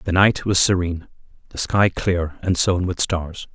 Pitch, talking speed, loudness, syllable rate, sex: 90 Hz, 185 wpm, -20 LUFS, 4.3 syllables/s, male